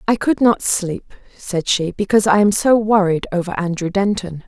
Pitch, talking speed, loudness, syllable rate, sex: 195 Hz, 190 wpm, -17 LUFS, 5.0 syllables/s, female